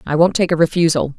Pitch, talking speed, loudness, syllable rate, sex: 165 Hz, 255 wpm, -16 LUFS, 6.7 syllables/s, female